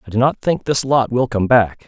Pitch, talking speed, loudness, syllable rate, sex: 120 Hz, 290 wpm, -17 LUFS, 5.3 syllables/s, male